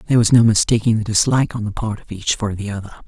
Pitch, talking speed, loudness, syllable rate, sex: 110 Hz, 275 wpm, -17 LUFS, 7.3 syllables/s, female